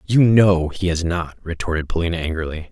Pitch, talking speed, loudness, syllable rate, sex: 85 Hz, 175 wpm, -19 LUFS, 5.5 syllables/s, male